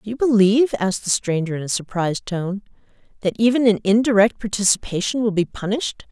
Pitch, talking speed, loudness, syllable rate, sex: 205 Hz, 175 wpm, -19 LUFS, 6.1 syllables/s, female